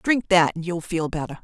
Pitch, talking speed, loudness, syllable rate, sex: 175 Hz, 250 wpm, -22 LUFS, 5.4 syllables/s, female